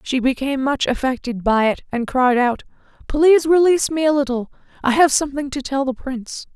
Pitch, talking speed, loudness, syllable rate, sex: 270 Hz, 190 wpm, -18 LUFS, 5.8 syllables/s, female